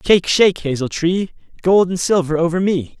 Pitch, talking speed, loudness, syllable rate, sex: 175 Hz, 180 wpm, -17 LUFS, 5.4 syllables/s, male